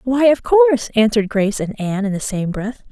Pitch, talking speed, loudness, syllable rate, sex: 230 Hz, 225 wpm, -17 LUFS, 6.0 syllables/s, female